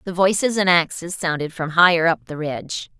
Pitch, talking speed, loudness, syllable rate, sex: 170 Hz, 200 wpm, -19 LUFS, 5.3 syllables/s, female